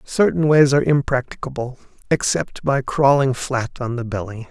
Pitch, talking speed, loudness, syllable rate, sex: 130 Hz, 145 wpm, -19 LUFS, 4.9 syllables/s, male